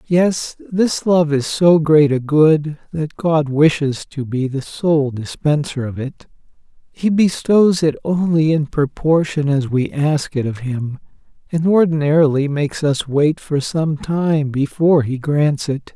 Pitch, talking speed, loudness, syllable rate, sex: 150 Hz, 160 wpm, -17 LUFS, 3.9 syllables/s, male